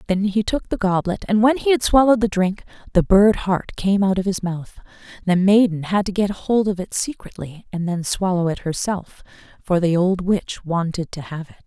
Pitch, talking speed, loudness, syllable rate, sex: 190 Hz, 215 wpm, -20 LUFS, 5.0 syllables/s, female